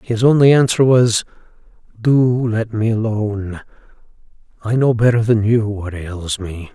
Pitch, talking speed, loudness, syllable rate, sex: 110 Hz, 140 wpm, -16 LUFS, 4.2 syllables/s, male